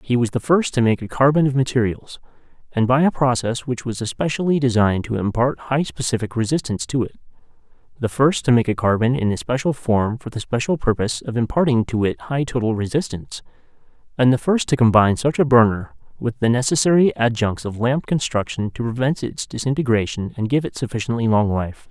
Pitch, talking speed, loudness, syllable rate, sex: 120 Hz, 195 wpm, -20 LUFS, 5.9 syllables/s, male